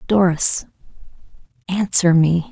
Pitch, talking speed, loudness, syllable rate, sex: 170 Hz, 70 wpm, -17 LUFS, 3.9 syllables/s, female